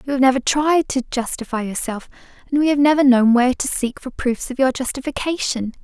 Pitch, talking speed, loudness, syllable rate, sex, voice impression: 260 Hz, 205 wpm, -19 LUFS, 5.7 syllables/s, female, very feminine, young, very thin, slightly relaxed, weak, bright, soft, slightly clear, fluent, slightly raspy, cute, slightly cool, very intellectual, very refreshing, sincere, slightly calm, very friendly, very reassuring, very unique, very elegant, slightly wild, very sweet, lively, kind, slightly sharp, slightly modest, light